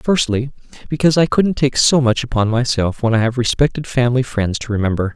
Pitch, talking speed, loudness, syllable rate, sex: 125 Hz, 200 wpm, -16 LUFS, 6.0 syllables/s, male